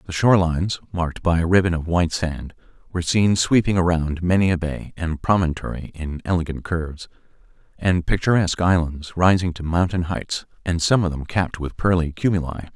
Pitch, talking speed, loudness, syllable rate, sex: 85 Hz, 170 wpm, -21 LUFS, 5.6 syllables/s, male